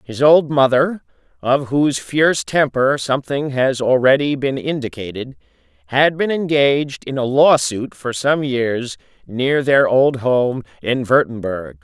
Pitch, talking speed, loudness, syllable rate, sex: 135 Hz, 140 wpm, -17 LUFS, 4.2 syllables/s, male